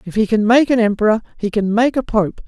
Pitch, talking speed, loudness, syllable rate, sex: 220 Hz, 265 wpm, -16 LUFS, 6.0 syllables/s, male